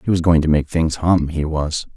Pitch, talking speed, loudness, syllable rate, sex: 80 Hz, 275 wpm, -18 LUFS, 5.0 syllables/s, male